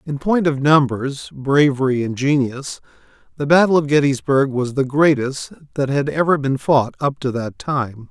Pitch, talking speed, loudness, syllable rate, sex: 140 Hz, 170 wpm, -18 LUFS, 4.5 syllables/s, male